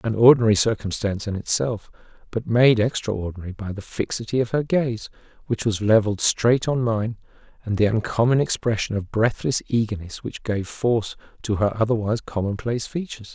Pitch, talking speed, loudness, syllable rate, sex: 110 Hz, 155 wpm, -22 LUFS, 5.7 syllables/s, male